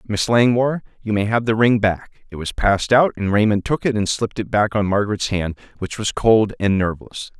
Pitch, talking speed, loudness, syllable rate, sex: 105 Hz, 225 wpm, -19 LUFS, 5.7 syllables/s, male